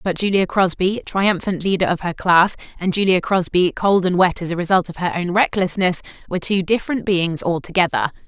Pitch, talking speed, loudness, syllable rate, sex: 180 Hz, 190 wpm, -18 LUFS, 5.5 syllables/s, female